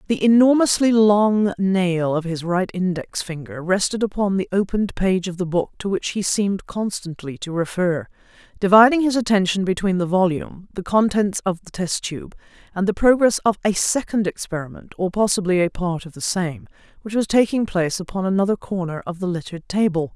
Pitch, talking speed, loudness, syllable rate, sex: 190 Hz, 180 wpm, -20 LUFS, 5.4 syllables/s, female